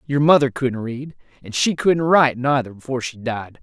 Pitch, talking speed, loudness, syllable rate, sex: 130 Hz, 200 wpm, -19 LUFS, 5.3 syllables/s, male